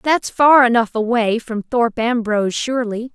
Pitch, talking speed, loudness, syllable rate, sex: 235 Hz, 155 wpm, -17 LUFS, 4.9 syllables/s, female